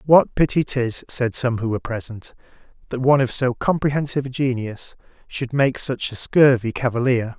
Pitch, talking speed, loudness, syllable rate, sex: 125 Hz, 170 wpm, -20 LUFS, 5.2 syllables/s, male